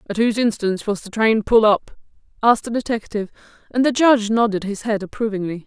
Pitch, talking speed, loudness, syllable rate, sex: 215 Hz, 190 wpm, -19 LUFS, 6.7 syllables/s, female